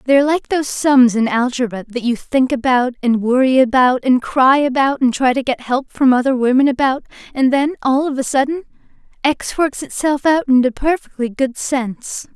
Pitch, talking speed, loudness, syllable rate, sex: 260 Hz, 195 wpm, -16 LUFS, 5.2 syllables/s, female